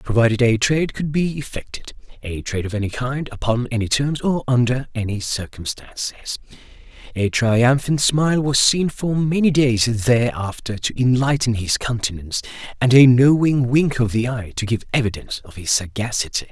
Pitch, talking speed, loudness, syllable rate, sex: 125 Hz, 155 wpm, -19 LUFS, 5.2 syllables/s, male